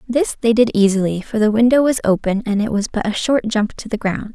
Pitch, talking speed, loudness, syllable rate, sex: 220 Hz, 260 wpm, -17 LUFS, 5.7 syllables/s, female